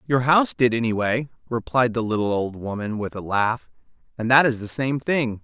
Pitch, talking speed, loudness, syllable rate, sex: 120 Hz, 200 wpm, -22 LUFS, 5.2 syllables/s, male